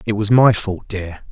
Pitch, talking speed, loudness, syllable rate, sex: 105 Hz, 230 wpm, -17 LUFS, 4.3 syllables/s, male